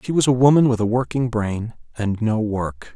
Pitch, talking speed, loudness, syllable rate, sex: 115 Hz, 225 wpm, -20 LUFS, 4.9 syllables/s, male